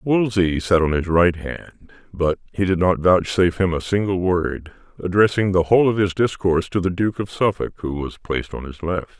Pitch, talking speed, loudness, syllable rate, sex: 90 Hz, 210 wpm, -20 LUFS, 5.1 syllables/s, male